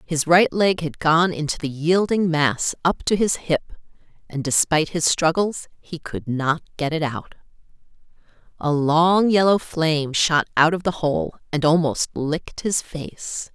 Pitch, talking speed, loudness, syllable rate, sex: 160 Hz, 165 wpm, -20 LUFS, 4.2 syllables/s, female